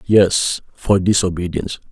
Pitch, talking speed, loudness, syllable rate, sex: 95 Hz, 95 wpm, -17 LUFS, 4.4 syllables/s, male